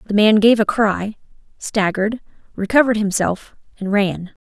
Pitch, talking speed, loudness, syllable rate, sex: 210 Hz, 135 wpm, -17 LUFS, 4.9 syllables/s, female